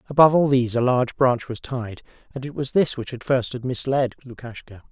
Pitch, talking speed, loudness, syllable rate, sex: 125 Hz, 220 wpm, -22 LUFS, 5.8 syllables/s, male